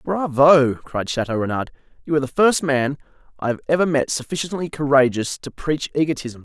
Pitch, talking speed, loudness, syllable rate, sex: 140 Hz, 160 wpm, -20 LUFS, 5.4 syllables/s, male